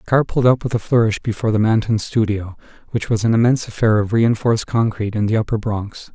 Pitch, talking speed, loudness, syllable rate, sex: 110 Hz, 225 wpm, -18 LUFS, 6.5 syllables/s, male